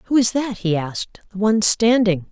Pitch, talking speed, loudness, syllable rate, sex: 210 Hz, 205 wpm, -19 LUFS, 5.1 syllables/s, female